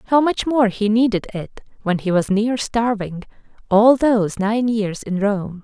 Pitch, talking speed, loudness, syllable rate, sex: 215 Hz, 180 wpm, -18 LUFS, 4.2 syllables/s, female